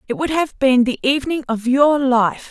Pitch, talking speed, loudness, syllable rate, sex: 265 Hz, 215 wpm, -17 LUFS, 4.8 syllables/s, female